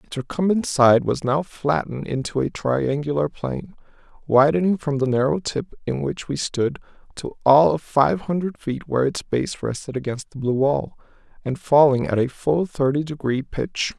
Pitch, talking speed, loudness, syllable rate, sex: 140 Hz, 175 wpm, -21 LUFS, 4.8 syllables/s, male